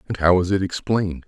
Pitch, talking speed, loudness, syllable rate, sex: 90 Hz, 235 wpm, -20 LUFS, 6.3 syllables/s, male